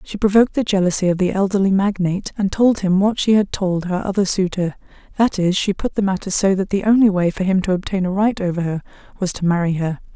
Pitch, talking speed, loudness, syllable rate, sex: 190 Hz, 240 wpm, -18 LUFS, 6.1 syllables/s, female